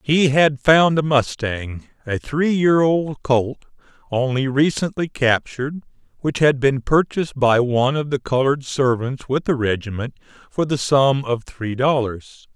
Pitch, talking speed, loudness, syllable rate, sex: 135 Hz, 155 wpm, -19 LUFS, 4.3 syllables/s, male